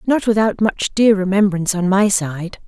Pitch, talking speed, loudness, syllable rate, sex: 200 Hz, 180 wpm, -16 LUFS, 4.8 syllables/s, female